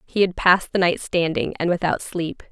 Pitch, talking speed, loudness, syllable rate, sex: 175 Hz, 215 wpm, -21 LUFS, 5.1 syllables/s, female